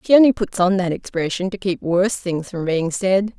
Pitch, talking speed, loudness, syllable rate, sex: 190 Hz, 230 wpm, -19 LUFS, 5.2 syllables/s, female